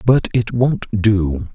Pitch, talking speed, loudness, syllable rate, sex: 105 Hz, 155 wpm, -17 LUFS, 3.0 syllables/s, male